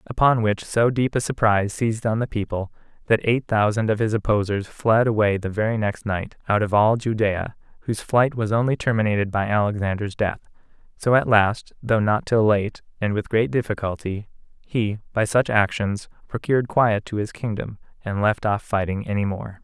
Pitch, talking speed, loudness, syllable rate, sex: 110 Hz, 185 wpm, -22 LUFS, 5.2 syllables/s, male